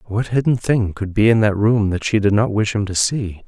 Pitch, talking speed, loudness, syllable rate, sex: 105 Hz, 275 wpm, -18 LUFS, 5.1 syllables/s, male